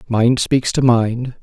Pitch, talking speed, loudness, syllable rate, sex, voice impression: 120 Hz, 170 wpm, -16 LUFS, 3.2 syllables/s, male, masculine, adult-like, slightly dark, fluent, cool, calm, reassuring, slightly wild, kind, modest